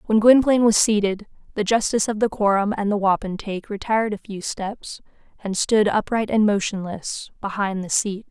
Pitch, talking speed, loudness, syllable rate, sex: 210 Hz, 175 wpm, -21 LUFS, 5.3 syllables/s, female